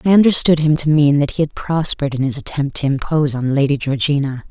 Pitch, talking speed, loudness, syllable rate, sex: 145 Hz, 225 wpm, -16 LUFS, 6.2 syllables/s, female